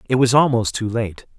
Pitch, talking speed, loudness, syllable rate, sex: 115 Hz, 215 wpm, -18 LUFS, 5.4 syllables/s, male